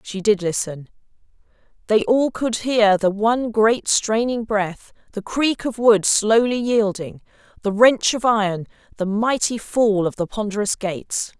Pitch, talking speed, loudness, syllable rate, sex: 215 Hz, 155 wpm, -19 LUFS, 4.2 syllables/s, female